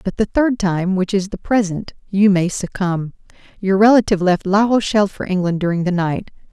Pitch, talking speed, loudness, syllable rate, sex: 195 Hz, 195 wpm, -17 LUFS, 5.3 syllables/s, female